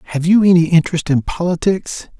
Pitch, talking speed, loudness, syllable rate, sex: 170 Hz, 165 wpm, -15 LUFS, 6.0 syllables/s, male